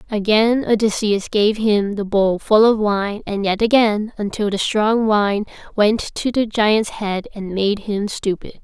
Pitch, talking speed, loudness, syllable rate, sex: 210 Hz, 175 wpm, -18 LUFS, 3.9 syllables/s, female